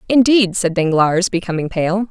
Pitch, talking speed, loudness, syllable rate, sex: 190 Hz, 145 wpm, -16 LUFS, 4.7 syllables/s, female